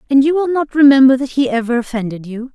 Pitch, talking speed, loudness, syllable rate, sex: 260 Hz, 235 wpm, -14 LUFS, 6.4 syllables/s, female